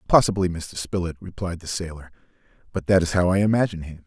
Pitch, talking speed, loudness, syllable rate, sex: 90 Hz, 190 wpm, -23 LUFS, 6.5 syllables/s, male